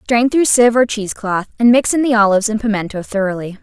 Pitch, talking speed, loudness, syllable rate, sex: 220 Hz, 215 wpm, -15 LUFS, 6.5 syllables/s, female